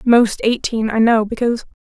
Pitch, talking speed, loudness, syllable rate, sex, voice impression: 225 Hz, 160 wpm, -17 LUFS, 5.2 syllables/s, female, feminine, slightly gender-neutral, slightly young, slightly adult-like, very thin, slightly tensed, slightly weak, slightly dark, slightly soft, clear, slightly halting, slightly raspy, cute, slightly intellectual, refreshing, very sincere, slightly calm, very friendly, reassuring, very unique, elegant, slightly wild, sweet, slightly lively, kind, slightly intense, slightly sharp, modest